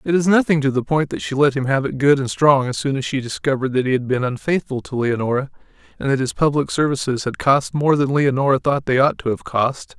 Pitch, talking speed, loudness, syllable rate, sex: 135 Hz, 260 wpm, -19 LUFS, 5.9 syllables/s, male